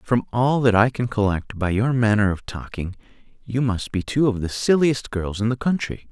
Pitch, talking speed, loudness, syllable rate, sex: 115 Hz, 215 wpm, -21 LUFS, 4.8 syllables/s, male